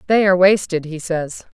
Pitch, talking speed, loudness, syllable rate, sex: 180 Hz, 190 wpm, -17 LUFS, 5.4 syllables/s, female